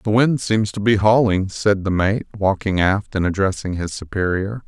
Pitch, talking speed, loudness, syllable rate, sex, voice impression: 100 Hz, 195 wpm, -19 LUFS, 4.7 syllables/s, male, very masculine, very adult-like, very middle-aged, very thick, tensed, very powerful, slightly bright, slightly soft, muffled, fluent, slightly raspy, cool, very intellectual, sincere, very calm, very mature, very friendly, very reassuring, unique, slightly elegant, very wild, slightly sweet, slightly lively, kind, slightly modest